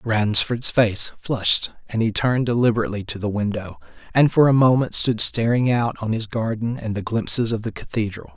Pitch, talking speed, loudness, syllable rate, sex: 115 Hz, 185 wpm, -20 LUFS, 5.3 syllables/s, male